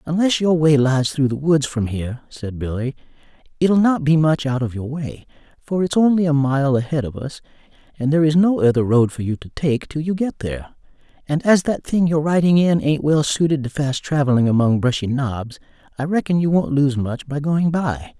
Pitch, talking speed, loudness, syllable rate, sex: 145 Hz, 220 wpm, -19 LUFS, 5.3 syllables/s, male